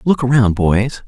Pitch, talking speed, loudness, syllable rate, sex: 115 Hz, 170 wpm, -14 LUFS, 4.2 syllables/s, male